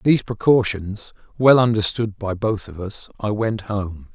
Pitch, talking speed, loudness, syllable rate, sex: 105 Hz, 160 wpm, -20 LUFS, 4.4 syllables/s, male